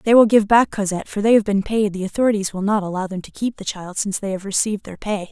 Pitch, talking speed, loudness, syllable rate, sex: 205 Hz, 295 wpm, -19 LUFS, 6.7 syllables/s, female